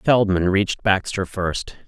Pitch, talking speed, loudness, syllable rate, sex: 95 Hz, 130 wpm, -21 LUFS, 3.9 syllables/s, male